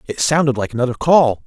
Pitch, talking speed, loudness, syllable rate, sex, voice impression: 135 Hz, 205 wpm, -16 LUFS, 6.0 syllables/s, male, very masculine, very adult-like, slightly thick, slightly muffled, sincere, slightly friendly